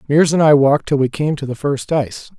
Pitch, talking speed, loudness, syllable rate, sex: 140 Hz, 275 wpm, -16 LUFS, 6.6 syllables/s, male